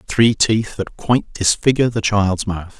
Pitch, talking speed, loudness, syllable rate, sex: 105 Hz, 170 wpm, -17 LUFS, 4.6 syllables/s, male